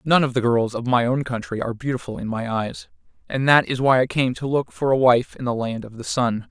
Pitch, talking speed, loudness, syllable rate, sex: 125 Hz, 275 wpm, -21 LUFS, 5.7 syllables/s, male